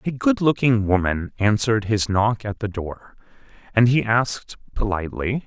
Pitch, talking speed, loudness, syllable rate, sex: 110 Hz, 155 wpm, -21 LUFS, 4.8 syllables/s, male